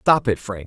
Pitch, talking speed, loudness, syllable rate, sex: 110 Hz, 270 wpm, -21 LUFS, 4.4 syllables/s, male